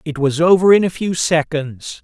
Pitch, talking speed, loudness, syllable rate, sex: 160 Hz, 205 wpm, -15 LUFS, 4.7 syllables/s, male